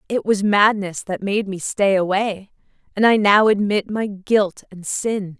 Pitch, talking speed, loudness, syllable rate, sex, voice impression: 200 Hz, 180 wpm, -19 LUFS, 4.0 syllables/s, female, feminine, slightly young, slightly adult-like, thin, tensed, powerful, bright, hard, clear, fluent, cute, slightly cool, intellectual, refreshing, slightly sincere, calm, friendly, very reassuring, elegant, slightly wild, slightly sweet, kind, slightly modest